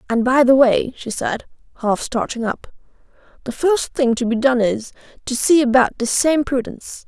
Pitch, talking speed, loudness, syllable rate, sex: 250 Hz, 185 wpm, -18 LUFS, 4.9 syllables/s, female